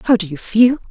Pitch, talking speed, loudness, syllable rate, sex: 215 Hz, 265 wpm, -15 LUFS, 6.1 syllables/s, female